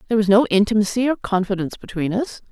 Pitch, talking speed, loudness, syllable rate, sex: 210 Hz, 190 wpm, -19 LUFS, 7.1 syllables/s, female